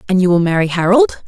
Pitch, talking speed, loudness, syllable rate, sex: 195 Hz, 235 wpm, -13 LUFS, 6.4 syllables/s, female